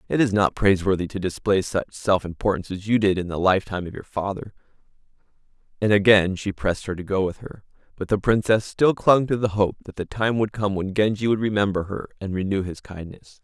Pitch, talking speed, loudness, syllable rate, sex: 100 Hz, 220 wpm, -22 LUFS, 6.0 syllables/s, male